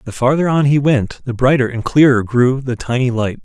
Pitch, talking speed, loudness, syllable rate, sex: 130 Hz, 225 wpm, -15 LUFS, 5.2 syllables/s, male